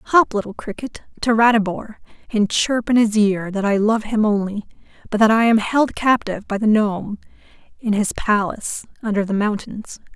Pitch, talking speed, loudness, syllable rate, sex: 215 Hz, 175 wpm, -19 LUFS, 5.1 syllables/s, female